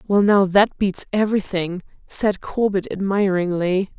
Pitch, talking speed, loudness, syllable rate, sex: 195 Hz, 120 wpm, -20 LUFS, 4.3 syllables/s, female